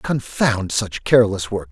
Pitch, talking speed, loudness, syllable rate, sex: 105 Hz, 140 wpm, -19 LUFS, 4.2 syllables/s, male